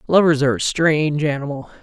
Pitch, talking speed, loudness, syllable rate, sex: 150 Hz, 165 wpm, -18 LUFS, 6.4 syllables/s, male